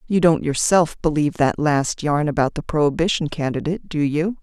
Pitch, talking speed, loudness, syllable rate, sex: 155 Hz, 175 wpm, -20 LUFS, 5.4 syllables/s, female